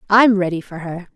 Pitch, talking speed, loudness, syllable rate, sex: 190 Hz, 210 wpm, -17 LUFS, 5.4 syllables/s, female